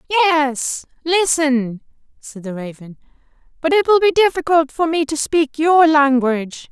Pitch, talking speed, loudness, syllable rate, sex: 300 Hz, 135 wpm, -16 LUFS, 4.1 syllables/s, female